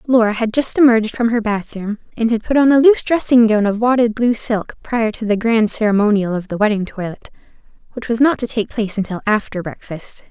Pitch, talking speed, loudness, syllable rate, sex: 225 Hz, 220 wpm, -16 LUFS, 5.8 syllables/s, female